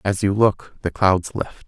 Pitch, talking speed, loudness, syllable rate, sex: 95 Hz, 215 wpm, -20 LUFS, 4.4 syllables/s, male